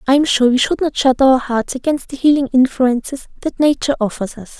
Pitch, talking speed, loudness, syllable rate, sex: 260 Hz, 220 wpm, -16 LUFS, 5.8 syllables/s, female